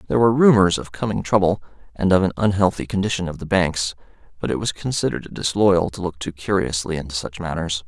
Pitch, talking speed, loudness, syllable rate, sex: 90 Hz, 200 wpm, -20 LUFS, 6.3 syllables/s, male